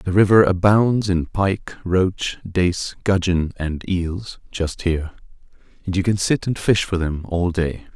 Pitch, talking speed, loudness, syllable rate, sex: 90 Hz, 165 wpm, -20 LUFS, 3.8 syllables/s, male